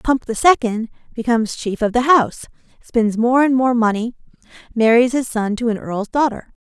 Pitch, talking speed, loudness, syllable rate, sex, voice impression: 235 Hz, 180 wpm, -17 LUFS, 5.1 syllables/s, female, very feminine, slightly adult-like, slightly cute, slightly refreshing, friendly